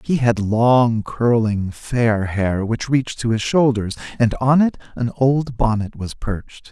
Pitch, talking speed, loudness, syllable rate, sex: 115 Hz, 170 wpm, -19 LUFS, 3.9 syllables/s, male